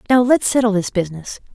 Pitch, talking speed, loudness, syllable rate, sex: 220 Hz, 195 wpm, -17 LUFS, 6.5 syllables/s, female